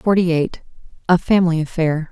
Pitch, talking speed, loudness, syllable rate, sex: 170 Hz, 140 wpm, -18 LUFS, 5.5 syllables/s, female